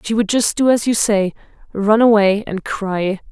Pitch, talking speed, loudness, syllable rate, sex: 210 Hz, 180 wpm, -16 LUFS, 4.4 syllables/s, female